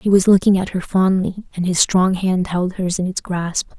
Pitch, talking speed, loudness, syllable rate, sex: 185 Hz, 240 wpm, -18 LUFS, 4.7 syllables/s, female